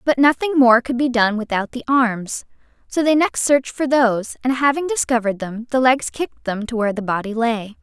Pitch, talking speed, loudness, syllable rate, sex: 245 Hz, 215 wpm, -18 LUFS, 5.5 syllables/s, female